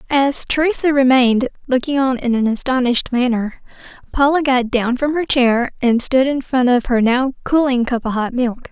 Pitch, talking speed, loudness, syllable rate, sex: 255 Hz, 185 wpm, -16 LUFS, 5.0 syllables/s, female